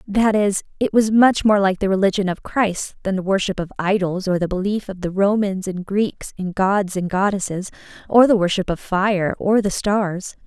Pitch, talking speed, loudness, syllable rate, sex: 195 Hz, 205 wpm, -19 LUFS, 4.8 syllables/s, female